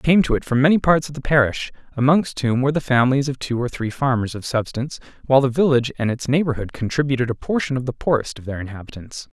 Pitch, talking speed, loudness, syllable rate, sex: 130 Hz, 235 wpm, -20 LUFS, 6.9 syllables/s, male